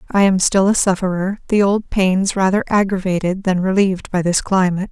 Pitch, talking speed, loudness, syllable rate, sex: 190 Hz, 185 wpm, -17 LUFS, 5.5 syllables/s, female